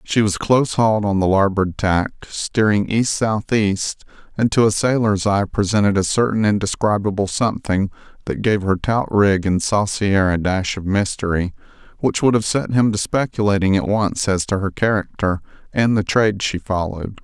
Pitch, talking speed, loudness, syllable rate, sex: 100 Hz, 180 wpm, -19 LUFS, 5.0 syllables/s, male